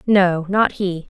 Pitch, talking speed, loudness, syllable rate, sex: 185 Hz, 150 wpm, -18 LUFS, 3.2 syllables/s, female